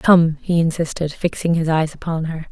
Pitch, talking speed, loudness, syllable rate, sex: 165 Hz, 190 wpm, -19 LUFS, 5.0 syllables/s, female